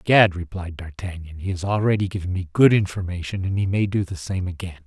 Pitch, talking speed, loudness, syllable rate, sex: 95 Hz, 210 wpm, -23 LUFS, 5.8 syllables/s, male